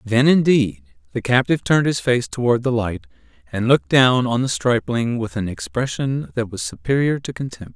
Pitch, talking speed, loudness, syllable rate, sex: 120 Hz, 185 wpm, -19 LUFS, 5.1 syllables/s, male